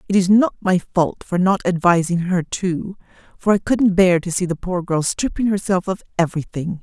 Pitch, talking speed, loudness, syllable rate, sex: 185 Hz, 200 wpm, -19 LUFS, 5.1 syllables/s, female